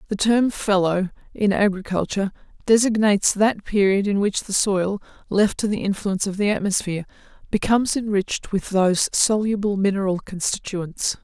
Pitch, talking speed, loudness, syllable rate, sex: 200 Hz, 140 wpm, -21 LUFS, 5.3 syllables/s, female